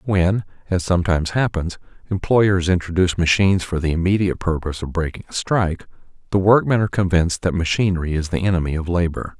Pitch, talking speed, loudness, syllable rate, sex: 90 Hz, 165 wpm, -19 LUFS, 6.4 syllables/s, male